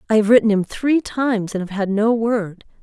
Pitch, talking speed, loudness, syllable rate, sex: 220 Hz, 235 wpm, -18 LUFS, 5.2 syllables/s, female